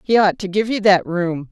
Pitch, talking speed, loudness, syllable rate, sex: 190 Hz, 280 wpm, -17 LUFS, 5.0 syllables/s, female